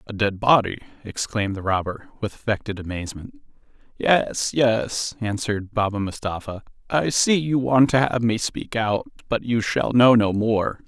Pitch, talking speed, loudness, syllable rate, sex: 110 Hz, 160 wpm, -22 LUFS, 4.7 syllables/s, male